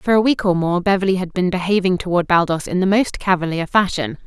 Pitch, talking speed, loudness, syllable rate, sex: 185 Hz, 225 wpm, -18 LUFS, 6.0 syllables/s, female